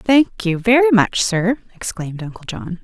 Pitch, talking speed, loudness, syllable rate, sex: 205 Hz, 170 wpm, -17 LUFS, 4.7 syllables/s, female